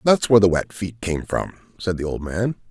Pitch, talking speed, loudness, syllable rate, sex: 100 Hz, 245 wpm, -21 LUFS, 5.5 syllables/s, male